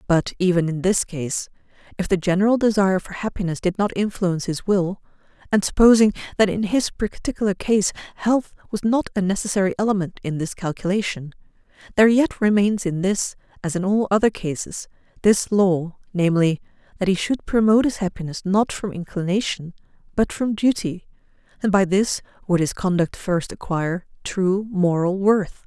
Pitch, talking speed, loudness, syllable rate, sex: 195 Hz, 160 wpm, -21 LUFS, 5.3 syllables/s, female